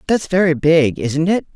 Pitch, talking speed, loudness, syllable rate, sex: 160 Hz, 195 wpm, -16 LUFS, 4.6 syllables/s, female